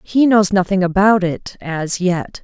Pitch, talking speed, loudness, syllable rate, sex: 190 Hz, 150 wpm, -16 LUFS, 3.9 syllables/s, female